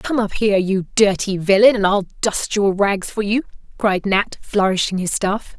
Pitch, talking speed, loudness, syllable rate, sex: 200 Hz, 195 wpm, -18 LUFS, 4.6 syllables/s, female